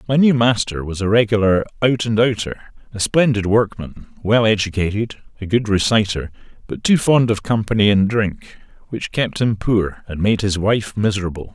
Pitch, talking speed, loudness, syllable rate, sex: 105 Hz, 170 wpm, -18 LUFS, 4.9 syllables/s, male